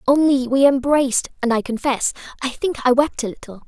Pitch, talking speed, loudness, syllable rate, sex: 260 Hz, 195 wpm, -19 LUFS, 5.6 syllables/s, female